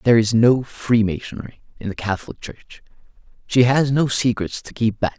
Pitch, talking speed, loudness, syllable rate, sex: 115 Hz, 175 wpm, -19 LUFS, 5.1 syllables/s, male